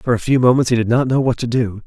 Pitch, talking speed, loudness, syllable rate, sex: 120 Hz, 355 wpm, -16 LUFS, 6.6 syllables/s, male